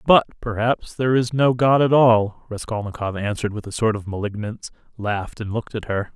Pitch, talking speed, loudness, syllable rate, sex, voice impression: 110 Hz, 195 wpm, -21 LUFS, 5.8 syllables/s, male, very masculine, adult-like, thick, cool, intellectual, slightly calm, slightly wild